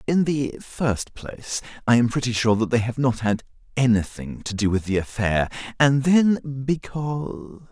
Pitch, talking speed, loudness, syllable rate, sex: 125 Hz, 170 wpm, -23 LUFS, 4.4 syllables/s, male